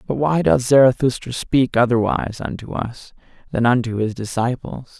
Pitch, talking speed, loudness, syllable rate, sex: 120 Hz, 145 wpm, -19 LUFS, 5.0 syllables/s, male